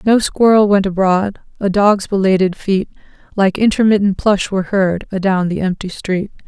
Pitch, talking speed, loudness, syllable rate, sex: 195 Hz, 155 wpm, -15 LUFS, 4.9 syllables/s, female